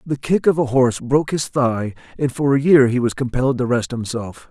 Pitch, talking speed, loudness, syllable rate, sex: 130 Hz, 240 wpm, -18 LUFS, 5.5 syllables/s, male